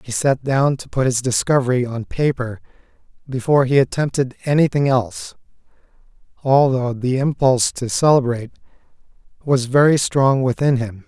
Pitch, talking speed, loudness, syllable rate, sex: 130 Hz, 130 wpm, -18 LUFS, 5.2 syllables/s, male